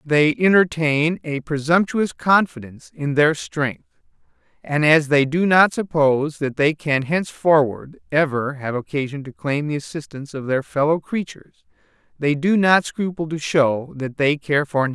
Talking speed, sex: 170 wpm, male